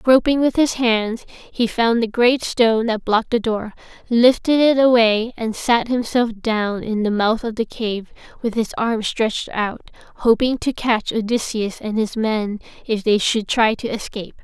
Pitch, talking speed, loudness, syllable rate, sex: 225 Hz, 185 wpm, -19 LUFS, 4.4 syllables/s, female